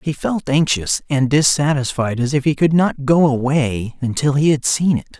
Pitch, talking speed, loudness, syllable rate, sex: 140 Hz, 195 wpm, -17 LUFS, 4.7 syllables/s, male